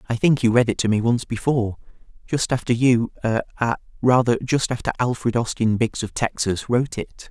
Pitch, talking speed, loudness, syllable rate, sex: 120 Hz, 165 wpm, -21 LUFS, 5.5 syllables/s, male